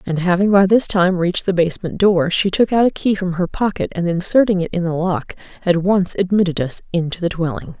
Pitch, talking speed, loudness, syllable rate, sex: 180 Hz, 230 wpm, -17 LUFS, 5.6 syllables/s, female